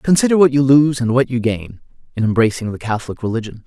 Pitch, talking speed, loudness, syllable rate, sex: 125 Hz, 215 wpm, -16 LUFS, 6.4 syllables/s, male